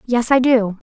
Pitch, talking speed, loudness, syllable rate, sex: 235 Hz, 195 wpm, -15 LUFS, 4.3 syllables/s, female